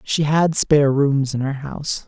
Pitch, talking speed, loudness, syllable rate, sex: 145 Hz, 200 wpm, -18 LUFS, 4.6 syllables/s, male